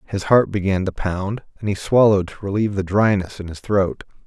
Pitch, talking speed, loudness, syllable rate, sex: 100 Hz, 210 wpm, -20 LUFS, 5.6 syllables/s, male